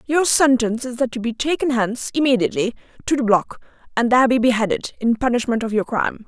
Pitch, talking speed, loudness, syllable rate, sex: 240 Hz, 200 wpm, -19 LUFS, 6.5 syllables/s, female